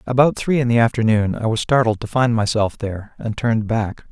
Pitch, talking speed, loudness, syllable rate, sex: 115 Hz, 220 wpm, -19 LUFS, 5.7 syllables/s, male